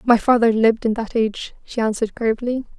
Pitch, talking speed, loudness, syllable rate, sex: 230 Hz, 195 wpm, -19 LUFS, 6.5 syllables/s, female